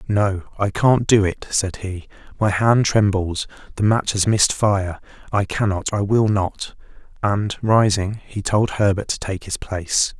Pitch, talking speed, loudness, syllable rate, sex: 100 Hz, 170 wpm, -20 LUFS, 4.2 syllables/s, male